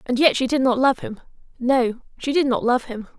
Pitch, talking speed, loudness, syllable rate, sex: 255 Hz, 245 wpm, -20 LUFS, 5.2 syllables/s, female